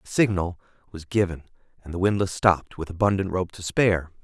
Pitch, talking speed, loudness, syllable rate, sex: 90 Hz, 185 wpm, -24 LUFS, 5.9 syllables/s, male